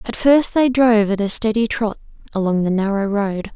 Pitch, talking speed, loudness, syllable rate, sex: 215 Hz, 205 wpm, -17 LUFS, 5.2 syllables/s, female